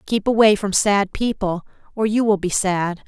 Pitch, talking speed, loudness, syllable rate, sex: 205 Hz, 195 wpm, -19 LUFS, 4.6 syllables/s, female